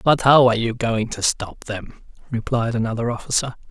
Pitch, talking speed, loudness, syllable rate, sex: 115 Hz, 180 wpm, -20 LUFS, 5.3 syllables/s, male